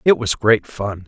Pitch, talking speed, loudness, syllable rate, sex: 105 Hz, 225 wpm, -18 LUFS, 4.1 syllables/s, male